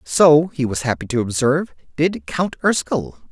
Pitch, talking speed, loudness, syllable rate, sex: 140 Hz, 165 wpm, -19 LUFS, 4.6 syllables/s, male